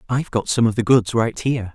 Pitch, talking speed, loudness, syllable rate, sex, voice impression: 115 Hz, 275 wpm, -19 LUFS, 6.4 syllables/s, male, masculine, slightly gender-neutral, adult-like, slightly middle-aged, slightly thick, slightly relaxed, slightly weak, slightly dark, slightly hard, slightly muffled, slightly fluent, cool, refreshing, very sincere, calm, friendly, reassuring, very elegant, sweet, lively, very kind, slightly modest